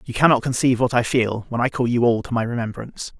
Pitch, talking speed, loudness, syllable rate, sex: 120 Hz, 265 wpm, -20 LUFS, 6.6 syllables/s, male